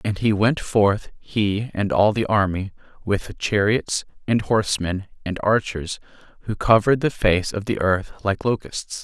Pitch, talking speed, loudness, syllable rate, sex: 105 Hz, 165 wpm, -21 LUFS, 4.4 syllables/s, male